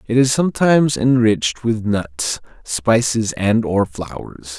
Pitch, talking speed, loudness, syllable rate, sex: 110 Hz, 130 wpm, -17 LUFS, 4.0 syllables/s, male